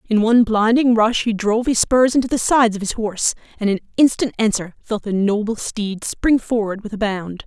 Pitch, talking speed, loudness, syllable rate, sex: 220 Hz, 215 wpm, -18 LUFS, 5.4 syllables/s, female